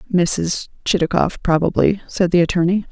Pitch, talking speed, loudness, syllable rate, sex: 175 Hz, 125 wpm, -18 LUFS, 5.2 syllables/s, female